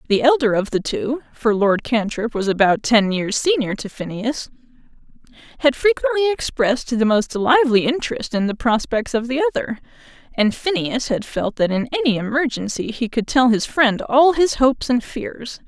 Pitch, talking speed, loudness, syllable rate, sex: 245 Hz, 170 wpm, -19 LUFS, 5.0 syllables/s, female